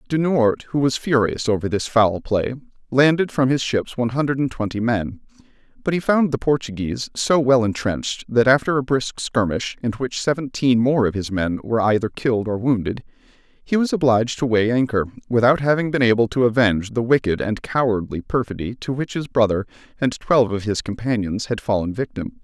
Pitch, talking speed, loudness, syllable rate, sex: 120 Hz, 190 wpm, -20 LUFS, 5.5 syllables/s, male